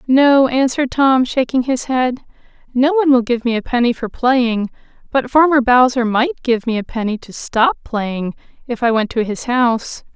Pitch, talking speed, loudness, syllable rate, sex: 250 Hz, 190 wpm, -16 LUFS, 4.8 syllables/s, female